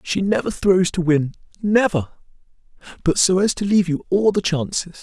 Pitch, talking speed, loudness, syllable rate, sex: 180 Hz, 155 wpm, -19 LUFS, 5.2 syllables/s, male